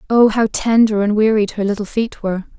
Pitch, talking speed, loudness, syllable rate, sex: 215 Hz, 210 wpm, -16 LUFS, 5.6 syllables/s, female